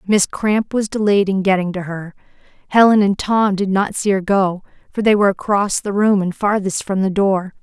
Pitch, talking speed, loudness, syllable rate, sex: 195 Hz, 210 wpm, -17 LUFS, 5.0 syllables/s, female